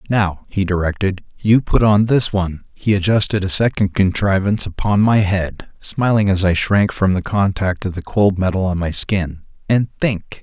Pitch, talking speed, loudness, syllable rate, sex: 95 Hz, 175 wpm, -17 LUFS, 4.7 syllables/s, male